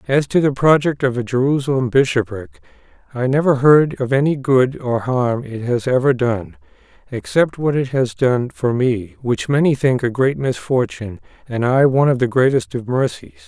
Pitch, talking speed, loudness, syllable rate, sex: 130 Hz, 185 wpm, -17 LUFS, 4.9 syllables/s, male